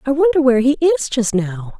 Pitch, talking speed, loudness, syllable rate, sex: 255 Hz, 235 wpm, -16 LUFS, 6.3 syllables/s, female